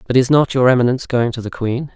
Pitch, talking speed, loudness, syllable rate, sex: 125 Hz, 275 wpm, -16 LUFS, 6.7 syllables/s, male